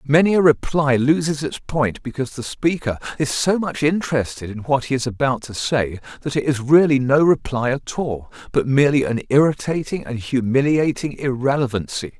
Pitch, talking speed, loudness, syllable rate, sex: 135 Hz, 170 wpm, -19 LUFS, 5.2 syllables/s, male